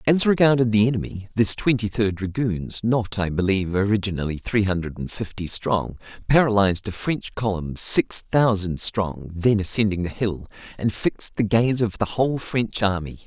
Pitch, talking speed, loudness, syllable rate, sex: 105 Hz, 170 wpm, -22 LUFS, 5.1 syllables/s, male